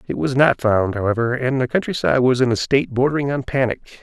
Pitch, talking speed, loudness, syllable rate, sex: 125 Hz, 225 wpm, -19 LUFS, 6.2 syllables/s, male